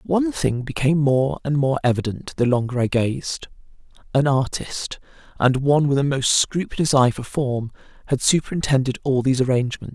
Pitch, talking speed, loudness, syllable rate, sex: 140 Hz, 165 wpm, -21 LUFS, 5.4 syllables/s, female